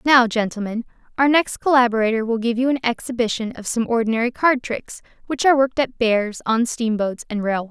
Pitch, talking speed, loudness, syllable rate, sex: 235 Hz, 185 wpm, -20 LUFS, 5.9 syllables/s, female